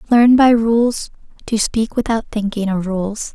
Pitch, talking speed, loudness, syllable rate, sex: 220 Hz, 160 wpm, -16 LUFS, 3.9 syllables/s, female